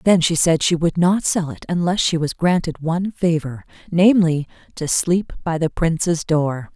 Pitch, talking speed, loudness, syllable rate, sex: 165 Hz, 180 wpm, -19 LUFS, 4.7 syllables/s, female